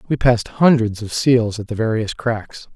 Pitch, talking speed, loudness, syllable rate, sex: 115 Hz, 195 wpm, -18 LUFS, 4.7 syllables/s, male